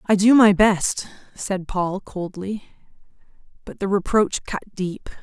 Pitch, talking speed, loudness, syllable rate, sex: 195 Hz, 140 wpm, -21 LUFS, 3.8 syllables/s, female